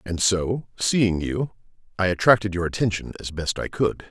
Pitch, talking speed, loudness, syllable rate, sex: 100 Hz, 175 wpm, -23 LUFS, 4.7 syllables/s, male